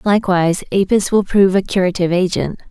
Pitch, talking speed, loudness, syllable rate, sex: 190 Hz, 155 wpm, -15 LUFS, 6.6 syllables/s, female